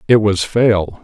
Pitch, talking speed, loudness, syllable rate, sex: 105 Hz, 175 wpm, -14 LUFS, 4.6 syllables/s, male